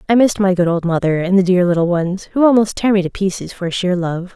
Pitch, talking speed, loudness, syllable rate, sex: 185 Hz, 275 wpm, -16 LUFS, 6.1 syllables/s, female